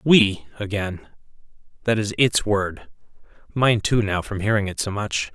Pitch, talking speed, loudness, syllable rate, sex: 100 Hz, 145 wpm, -22 LUFS, 4.2 syllables/s, male